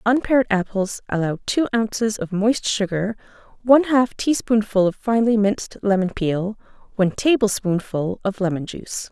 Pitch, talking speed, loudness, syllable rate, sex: 210 Hz, 145 wpm, -20 LUFS, 5.3 syllables/s, female